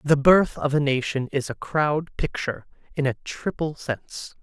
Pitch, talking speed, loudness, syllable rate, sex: 145 Hz, 175 wpm, -24 LUFS, 4.7 syllables/s, male